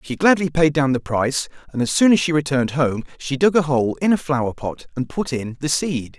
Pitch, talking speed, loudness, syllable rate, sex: 145 Hz, 250 wpm, -20 LUFS, 5.6 syllables/s, male